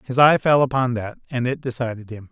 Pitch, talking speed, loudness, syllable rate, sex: 125 Hz, 235 wpm, -20 LUFS, 5.7 syllables/s, male